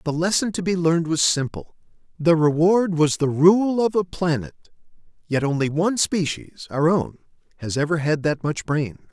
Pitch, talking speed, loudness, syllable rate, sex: 165 Hz, 180 wpm, -21 LUFS, 4.9 syllables/s, male